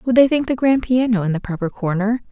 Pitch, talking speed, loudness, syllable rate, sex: 225 Hz, 260 wpm, -18 LUFS, 5.9 syllables/s, female